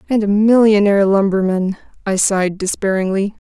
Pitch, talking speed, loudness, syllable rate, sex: 200 Hz, 120 wpm, -15 LUFS, 5.5 syllables/s, female